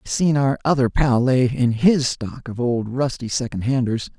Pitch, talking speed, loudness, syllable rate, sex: 125 Hz, 200 wpm, -20 LUFS, 4.6 syllables/s, male